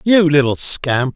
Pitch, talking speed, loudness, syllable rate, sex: 150 Hz, 155 wpm, -15 LUFS, 3.6 syllables/s, male